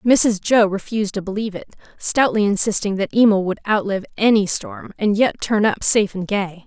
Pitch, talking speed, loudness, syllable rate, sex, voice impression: 205 Hz, 190 wpm, -18 LUFS, 5.4 syllables/s, female, feminine, adult-like, slightly powerful, fluent, intellectual, slightly sharp